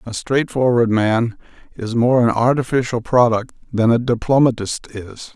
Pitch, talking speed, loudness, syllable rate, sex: 120 Hz, 135 wpm, -17 LUFS, 4.6 syllables/s, male